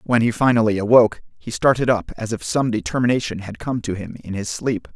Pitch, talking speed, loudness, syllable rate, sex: 115 Hz, 220 wpm, -20 LUFS, 5.9 syllables/s, male